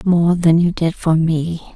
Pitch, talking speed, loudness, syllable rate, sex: 165 Hz, 205 wpm, -16 LUFS, 3.6 syllables/s, female